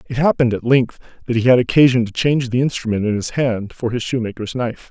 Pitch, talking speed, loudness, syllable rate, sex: 120 Hz, 230 wpm, -18 LUFS, 6.6 syllables/s, male